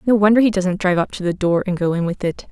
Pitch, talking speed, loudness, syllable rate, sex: 190 Hz, 335 wpm, -18 LUFS, 6.8 syllables/s, female